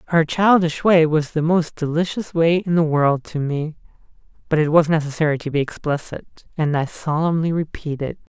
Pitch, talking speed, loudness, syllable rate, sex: 160 Hz, 170 wpm, -19 LUFS, 5.1 syllables/s, male